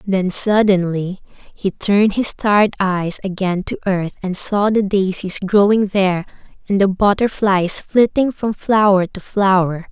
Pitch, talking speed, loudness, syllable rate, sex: 195 Hz, 145 wpm, -17 LUFS, 4.3 syllables/s, female